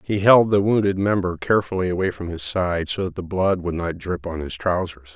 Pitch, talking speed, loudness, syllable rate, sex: 90 Hz, 235 wpm, -21 LUFS, 5.7 syllables/s, male